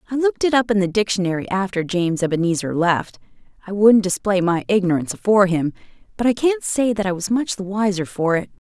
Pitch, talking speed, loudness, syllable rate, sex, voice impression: 195 Hz, 195 wpm, -19 LUFS, 6.2 syllables/s, female, feminine, adult-like, tensed, powerful, clear, fluent, intellectual, calm, slightly reassuring, elegant, lively, slightly sharp